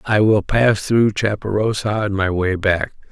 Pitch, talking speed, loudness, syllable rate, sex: 105 Hz, 175 wpm, -18 LUFS, 4.2 syllables/s, male